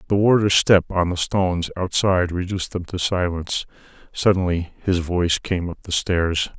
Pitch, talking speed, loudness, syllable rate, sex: 90 Hz, 165 wpm, -21 LUFS, 5.1 syllables/s, male